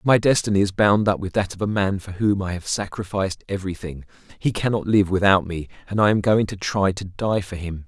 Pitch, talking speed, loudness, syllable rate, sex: 100 Hz, 245 wpm, -22 LUFS, 5.7 syllables/s, male